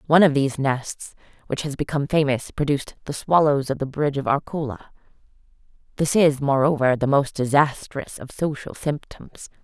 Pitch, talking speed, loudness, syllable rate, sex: 140 Hz, 155 wpm, -22 LUFS, 5.3 syllables/s, female